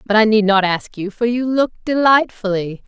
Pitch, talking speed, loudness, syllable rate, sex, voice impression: 220 Hz, 210 wpm, -16 LUFS, 4.9 syllables/s, female, very feminine, slightly adult-like, slightly thin, tensed, slightly weak, slightly bright, hard, clear, fluent, cute, intellectual, refreshing, sincere, calm, friendly, reassuring, unique, slightly elegant, wild, slightly sweet, lively, strict, sharp